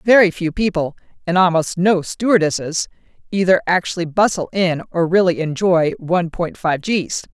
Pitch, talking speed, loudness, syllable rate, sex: 175 Hz, 145 wpm, -18 LUFS, 5.0 syllables/s, female